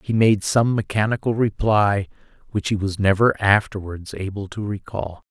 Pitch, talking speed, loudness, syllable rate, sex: 100 Hz, 145 wpm, -21 LUFS, 4.7 syllables/s, male